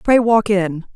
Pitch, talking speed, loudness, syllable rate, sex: 205 Hz, 190 wpm, -16 LUFS, 3.8 syllables/s, female